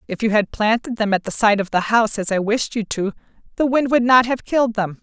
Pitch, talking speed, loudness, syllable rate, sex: 220 Hz, 275 wpm, -19 LUFS, 5.9 syllables/s, female